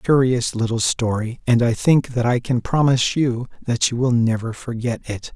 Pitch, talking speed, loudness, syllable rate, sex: 120 Hz, 225 wpm, -20 LUFS, 6.4 syllables/s, male